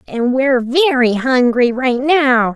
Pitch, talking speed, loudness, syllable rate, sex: 255 Hz, 140 wpm, -14 LUFS, 3.8 syllables/s, female